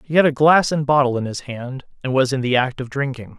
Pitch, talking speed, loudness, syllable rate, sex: 135 Hz, 285 wpm, -19 LUFS, 5.8 syllables/s, male